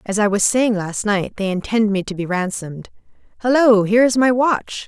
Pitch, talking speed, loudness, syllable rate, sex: 210 Hz, 210 wpm, -17 LUFS, 5.2 syllables/s, female